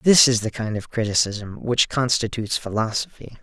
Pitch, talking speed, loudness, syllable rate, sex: 115 Hz, 160 wpm, -21 LUFS, 5.2 syllables/s, male